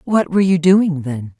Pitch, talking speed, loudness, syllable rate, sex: 165 Hz, 215 wpm, -15 LUFS, 4.8 syllables/s, female